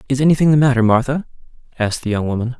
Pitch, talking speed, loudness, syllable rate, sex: 130 Hz, 210 wpm, -16 LUFS, 7.9 syllables/s, male